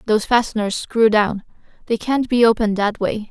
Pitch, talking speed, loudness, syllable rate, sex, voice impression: 220 Hz, 180 wpm, -18 LUFS, 5.6 syllables/s, female, feminine, adult-like, slightly relaxed, powerful, soft, fluent, intellectual, friendly, reassuring, elegant, lively, kind